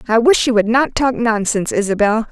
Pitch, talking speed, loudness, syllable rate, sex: 230 Hz, 210 wpm, -15 LUFS, 5.6 syllables/s, female